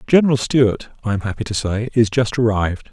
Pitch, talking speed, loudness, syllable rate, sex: 115 Hz, 205 wpm, -18 LUFS, 6.2 syllables/s, male